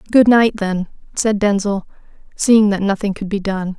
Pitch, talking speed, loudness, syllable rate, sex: 200 Hz, 175 wpm, -16 LUFS, 4.6 syllables/s, female